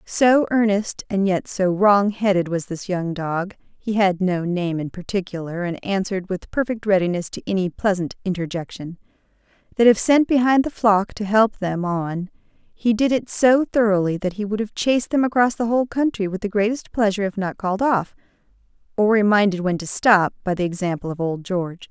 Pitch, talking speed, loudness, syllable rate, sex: 200 Hz, 190 wpm, -20 LUFS, 3.9 syllables/s, female